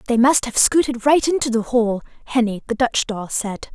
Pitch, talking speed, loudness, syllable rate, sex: 240 Hz, 210 wpm, -19 LUFS, 5.0 syllables/s, female